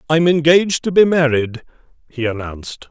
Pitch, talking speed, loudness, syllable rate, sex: 140 Hz, 145 wpm, -15 LUFS, 5.4 syllables/s, male